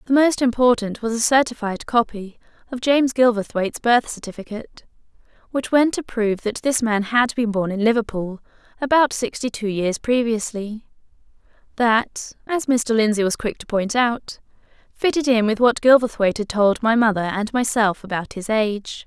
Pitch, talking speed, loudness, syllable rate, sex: 225 Hz, 165 wpm, -20 LUFS, 5.0 syllables/s, female